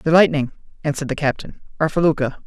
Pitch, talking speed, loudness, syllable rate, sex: 150 Hz, 170 wpm, -20 LUFS, 6.8 syllables/s, male